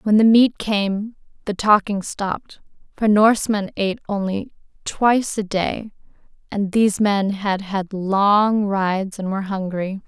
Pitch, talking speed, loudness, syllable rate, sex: 200 Hz, 145 wpm, -19 LUFS, 4.2 syllables/s, female